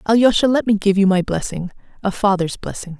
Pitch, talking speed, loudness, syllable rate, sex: 205 Hz, 180 wpm, -18 LUFS, 5.9 syllables/s, female